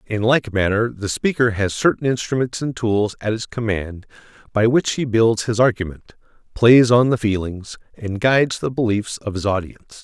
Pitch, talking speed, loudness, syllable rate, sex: 110 Hz, 180 wpm, -19 LUFS, 4.9 syllables/s, male